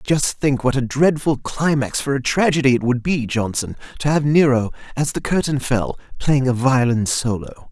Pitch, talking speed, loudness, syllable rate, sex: 135 Hz, 185 wpm, -19 LUFS, 4.8 syllables/s, male